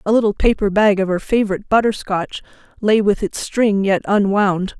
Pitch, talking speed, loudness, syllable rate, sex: 200 Hz, 190 wpm, -17 LUFS, 5.2 syllables/s, female